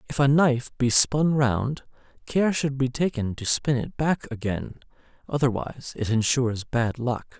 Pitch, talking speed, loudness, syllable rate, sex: 130 Hz, 160 wpm, -24 LUFS, 4.6 syllables/s, male